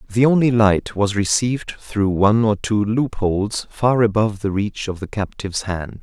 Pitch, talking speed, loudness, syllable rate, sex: 105 Hz, 190 wpm, -19 LUFS, 4.8 syllables/s, male